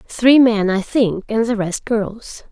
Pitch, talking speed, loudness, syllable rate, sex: 220 Hz, 190 wpm, -16 LUFS, 3.5 syllables/s, female